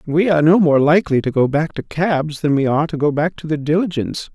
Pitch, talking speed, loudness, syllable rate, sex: 155 Hz, 265 wpm, -17 LUFS, 6.2 syllables/s, male